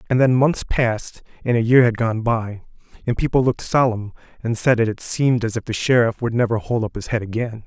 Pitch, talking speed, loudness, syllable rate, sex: 115 Hz, 235 wpm, -20 LUFS, 5.9 syllables/s, male